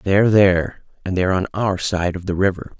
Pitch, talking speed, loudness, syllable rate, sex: 95 Hz, 215 wpm, -18 LUFS, 5.8 syllables/s, male